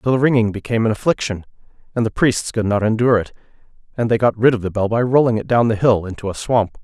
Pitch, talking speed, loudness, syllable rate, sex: 115 Hz, 255 wpm, -18 LUFS, 6.9 syllables/s, male